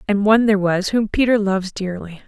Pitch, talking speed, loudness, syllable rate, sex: 205 Hz, 210 wpm, -18 LUFS, 6.2 syllables/s, female